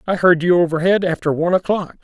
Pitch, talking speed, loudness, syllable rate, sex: 175 Hz, 205 wpm, -17 LUFS, 6.5 syllables/s, male